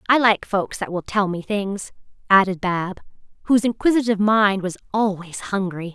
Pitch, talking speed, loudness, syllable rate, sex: 200 Hz, 160 wpm, -21 LUFS, 5.0 syllables/s, female